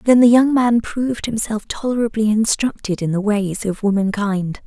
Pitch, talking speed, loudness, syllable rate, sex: 215 Hz, 165 wpm, -18 LUFS, 4.8 syllables/s, female